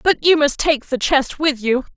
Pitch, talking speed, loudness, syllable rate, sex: 280 Hz, 245 wpm, -17 LUFS, 4.4 syllables/s, female